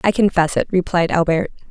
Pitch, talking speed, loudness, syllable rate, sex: 175 Hz, 175 wpm, -17 LUFS, 5.7 syllables/s, female